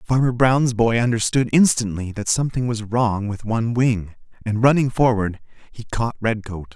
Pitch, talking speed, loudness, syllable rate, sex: 115 Hz, 160 wpm, -20 LUFS, 4.9 syllables/s, male